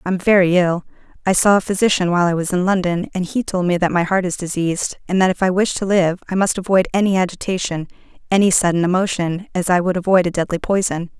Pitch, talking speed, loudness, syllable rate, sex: 185 Hz, 230 wpm, -18 LUFS, 6.2 syllables/s, female